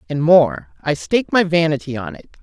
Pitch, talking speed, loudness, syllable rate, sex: 165 Hz, 175 wpm, -17 LUFS, 5.4 syllables/s, female